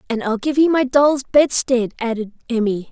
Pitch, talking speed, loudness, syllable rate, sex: 250 Hz, 185 wpm, -18 LUFS, 5.0 syllables/s, female